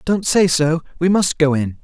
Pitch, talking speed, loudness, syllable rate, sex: 165 Hz, 230 wpm, -16 LUFS, 4.5 syllables/s, male